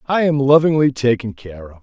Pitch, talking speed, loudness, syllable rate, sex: 130 Hz, 200 wpm, -15 LUFS, 5.3 syllables/s, male